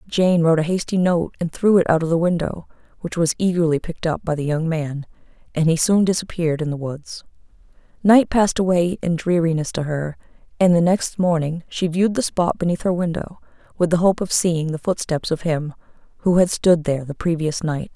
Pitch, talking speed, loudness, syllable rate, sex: 170 Hz, 205 wpm, -20 LUFS, 5.6 syllables/s, female